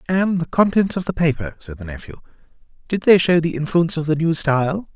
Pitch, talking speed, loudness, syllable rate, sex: 160 Hz, 220 wpm, -18 LUFS, 5.9 syllables/s, male